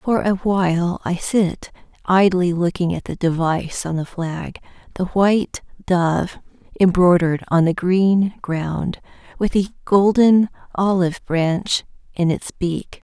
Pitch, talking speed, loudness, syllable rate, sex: 180 Hz, 130 wpm, -19 LUFS, 3.9 syllables/s, female